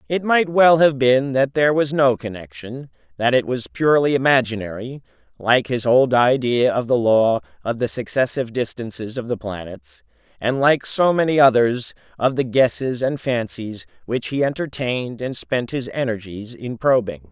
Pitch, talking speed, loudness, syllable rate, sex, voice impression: 125 Hz, 165 wpm, -19 LUFS, 4.8 syllables/s, male, masculine, adult-like, refreshing, slightly sincere, friendly, slightly lively